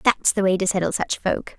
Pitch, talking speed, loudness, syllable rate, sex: 195 Hz, 265 wpm, -21 LUFS, 5.4 syllables/s, female